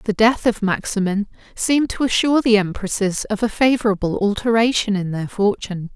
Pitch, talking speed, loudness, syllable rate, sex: 215 Hz, 160 wpm, -19 LUFS, 5.5 syllables/s, female